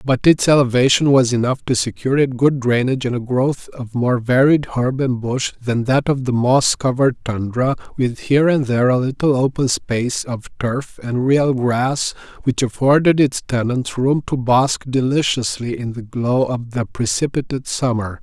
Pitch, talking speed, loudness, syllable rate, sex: 130 Hz, 180 wpm, -18 LUFS, 4.7 syllables/s, male